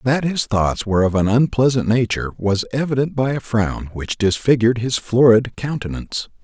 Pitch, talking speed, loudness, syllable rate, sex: 115 Hz, 170 wpm, -18 LUFS, 5.3 syllables/s, male